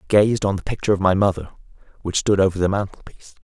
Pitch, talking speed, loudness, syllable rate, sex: 95 Hz, 245 wpm, -20 LUFS, 7.0 syllables/s, male